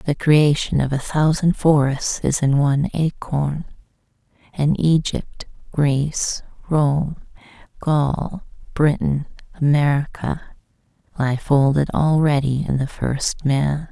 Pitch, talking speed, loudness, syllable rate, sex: 145 Hz, 105 wpm, -20 LUFS, 3.6 syllables/s, female